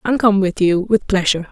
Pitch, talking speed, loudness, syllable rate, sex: 195 Hz, 240 wpm, -16 LUFS, 5.7 syllables/s, female